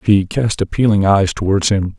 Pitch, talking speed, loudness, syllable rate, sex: 100 Hz, 180 wpm, -15 LUFS, 4.9 syllables/s, male